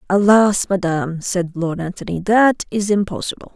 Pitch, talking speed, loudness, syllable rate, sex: 190 Hz, 135 wpm, -18 LUFS, 4.9 syllables/s, female